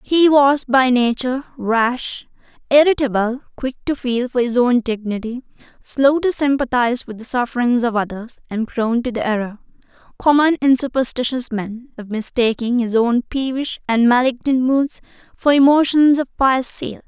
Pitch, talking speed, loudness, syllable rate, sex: 250 Hz, 150 wpm, -17 LUFS, 4.7 syllables/s, female